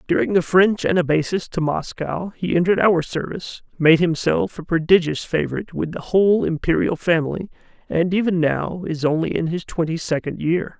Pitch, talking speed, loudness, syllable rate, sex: 170 Hz, 165 wpm, -20 LUFS, 5.4 syllables/s, male